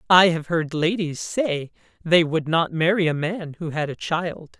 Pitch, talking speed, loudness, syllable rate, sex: 165 Hz, 195 wpm, -22 LUFS, 4.1 syllables/s, female